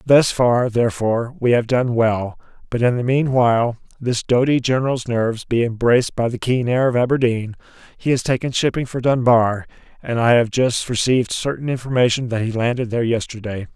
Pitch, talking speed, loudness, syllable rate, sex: 120 Hz, 180 wpm, -19 LUFS, 5.4 syllables/s, male